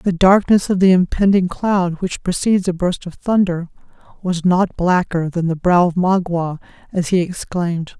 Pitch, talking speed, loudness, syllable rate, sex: 180 Hz, 175 wpm, -17 LUFS, 4.7 syllables/s, female